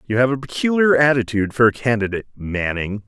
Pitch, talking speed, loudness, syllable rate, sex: 120 Hz, 175 wpm, -18 LUFS, 6.4 syllables/s, male